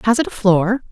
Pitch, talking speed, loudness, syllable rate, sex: 215 Hz, 265 wpm, -16 LUFS, 5.6 syllables/s, female